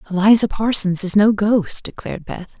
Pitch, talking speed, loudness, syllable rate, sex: 205 Hz, 160 wpm, -16 LUFS, 5.1 syllables/s, female